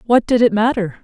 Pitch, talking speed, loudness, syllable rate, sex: 225 Hz, 230 wpm, -15 LUFS, 5.4 syllables/s, female